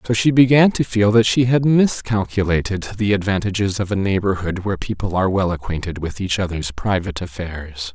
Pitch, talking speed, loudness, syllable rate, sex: 100 Hz, 180 wpm, -19 LUFS, 5.5 syllables/s, male